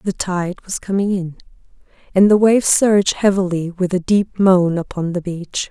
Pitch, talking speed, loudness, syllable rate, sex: 185 Hz, 180 wpm, -17 LUFS, 4.9 syllables/s, female